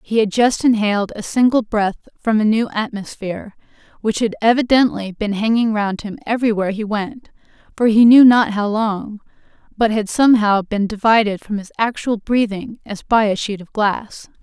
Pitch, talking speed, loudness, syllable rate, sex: 215 Hz, 175 wpm, -17 LUFS, 5.0 syllables/s, female